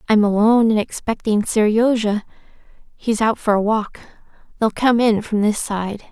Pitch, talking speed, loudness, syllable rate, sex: 215 Hz, 155 wpm, -18 LUFS, 4.7 syllables/s, female